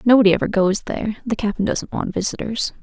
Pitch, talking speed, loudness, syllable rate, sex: 210 Hz, 170 wpm, -20 LUFS, 6.4 syllables/s, female